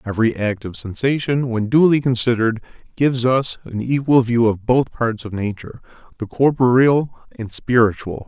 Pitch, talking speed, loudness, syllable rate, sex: 120 Hz, 150 wpm, -18 LUFS, 5.2 syllables/s, male